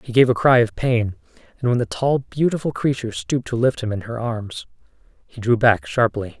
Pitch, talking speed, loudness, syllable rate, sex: 115 Hz, 215 wpm, -20 LUFS, 5.5 syllables/s, male